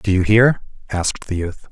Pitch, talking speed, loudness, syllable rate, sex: 100 Hz, 210 wpm, -18 LUFS, 5.0 syllables/s, male